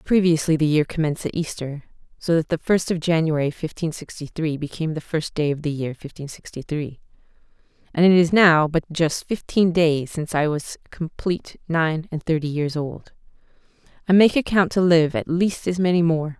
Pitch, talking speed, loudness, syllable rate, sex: 160 Hz, 185 wpm, -21 LUFS, 5.2 syllables/s, female